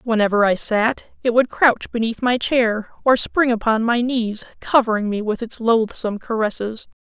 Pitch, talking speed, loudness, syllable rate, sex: 230 Hz, 170 wpm, -19 LUFS, 4.8 syllables/s, female